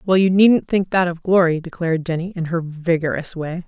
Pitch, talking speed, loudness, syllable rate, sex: 175 Hz, 210 wpm, -19 LUFS, 5.4 syllables/s, female